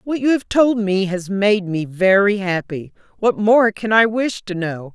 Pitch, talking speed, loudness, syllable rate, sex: 205 Hz, 195 wpm, -17 LUFS, 4.2 syllables/s, female